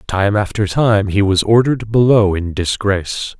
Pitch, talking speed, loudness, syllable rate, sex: 105 Hz, 160 wpm, -15 LUFS, 4.6 syllables/s, male